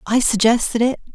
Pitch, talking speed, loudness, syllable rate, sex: 235 Hz, 155 wpm, -17 LUFS, 5.5 syllables/s, female